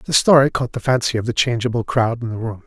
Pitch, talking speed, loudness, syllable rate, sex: 120 Hz, 270 wpm, -18 LUFS, 6.1 syllables/s, male